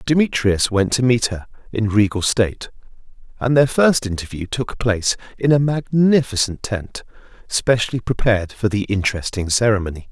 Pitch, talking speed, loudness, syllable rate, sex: 110 Hz, 140 wpm, -19 LUFS, 5.2 syllables/s, male